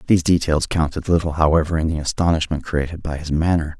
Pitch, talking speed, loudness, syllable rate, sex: 80 Hz, 190 wpm, -20 LUFS, 6.4 syllables/s, male